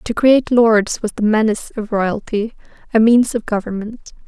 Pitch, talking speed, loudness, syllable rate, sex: 220 Hz, 170 wpm, -16 LUFS, 4.8 syllables/s, female